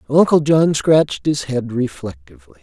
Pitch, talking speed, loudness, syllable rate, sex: 135 Hz, 135 wpm, -16 LUFS, 4.9 syllables/s, male